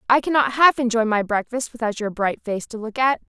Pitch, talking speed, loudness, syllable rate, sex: 235 Hz, 230 wpm, -21 LUFS, 5.5 syllables/s, female